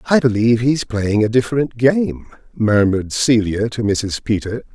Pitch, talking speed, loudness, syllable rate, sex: 115 Hz, 150 wpm, -17 LUFS, 4.8 syllables/s, male